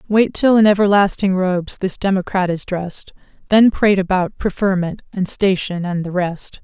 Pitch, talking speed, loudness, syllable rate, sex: 190 Hz, 165 wpm, -17 LUFS, 5.0 syllables/s, female